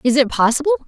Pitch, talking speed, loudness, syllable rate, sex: 270 Hz, 205 wpm, -16 LUFS, 7.1 syllables/s, female